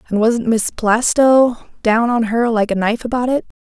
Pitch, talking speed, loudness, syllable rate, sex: 230 Hz, 195 wpm, -16 LUFS, 5.1 syllables/s, female